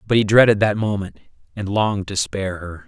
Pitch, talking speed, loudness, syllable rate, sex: 100 Hz, 210 wpm, -19 LUFS, 5.9 syllables/s, male